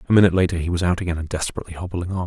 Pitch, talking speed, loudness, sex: 90 Hz, 290 wpm, -22 LUFS, male